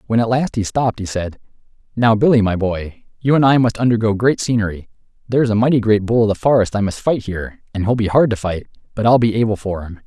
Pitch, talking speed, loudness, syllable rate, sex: 110 Hz, 250 wpm, -17 LUFS, 6.3 syllables/s, male